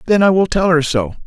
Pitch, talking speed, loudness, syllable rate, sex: 165 Hz, 285 wpm, -14 LUFS, 5.8 syllables/s, male